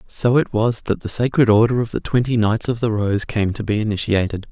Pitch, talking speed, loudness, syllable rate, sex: 110 Hz, 240 wpm, -19 LUFS, 5.5 syllables/s, male